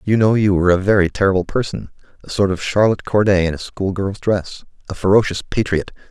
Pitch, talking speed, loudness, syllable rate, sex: 100 Hz, 195 wpm, -17 LUFS, 6.1 syllables/s, male